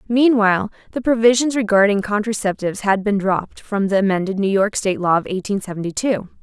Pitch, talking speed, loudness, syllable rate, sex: 205 Hz, 175 wpm, -18 LUFS, 6.1 syllables/s, female